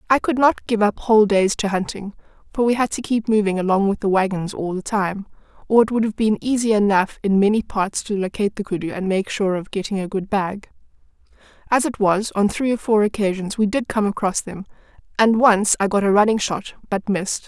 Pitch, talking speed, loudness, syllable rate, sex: 205 Hz, 220 wpm, -20 LUFS, 5.6 syllables/s, female